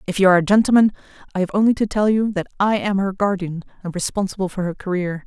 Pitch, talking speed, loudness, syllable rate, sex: 195 Hz, 240 wpm, -19 LUFS, 6.9 syllables/s, female